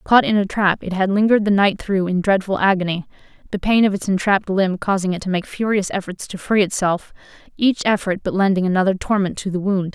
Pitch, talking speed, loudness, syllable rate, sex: 195 Hz, 225 wpm, -19 LUFS, 6.0 syllables/s, female